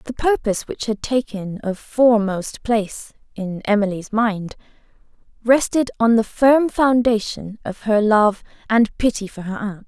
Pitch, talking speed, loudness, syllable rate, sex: 220 Hz, 145 wpm, -19 LUFS, 4.3 syllables/s, female